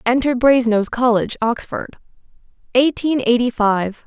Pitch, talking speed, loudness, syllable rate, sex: 240 Hz, 105 wpm, -17 LUFS, 5.4 syllables/s, female